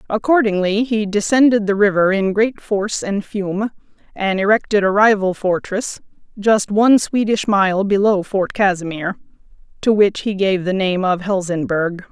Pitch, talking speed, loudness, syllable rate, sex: 200 Hz, 150 wpm, -17 LUFS, 4.6 syllables/s, female